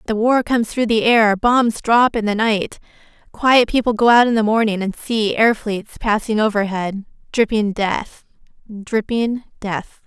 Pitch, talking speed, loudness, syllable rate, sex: 220 Hz, 155 wpm, -17 LUFS, 4.3 syllables/s, female